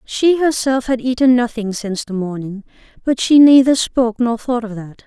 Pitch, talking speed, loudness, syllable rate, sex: 240 Hz, 190 wpm, -15 LUFS, 5.0 syllables/s, female